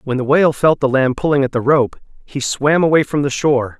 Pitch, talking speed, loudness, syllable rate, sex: 140 Hz, 255 wpm, -15 LUFS, 5.8 syllables/s, male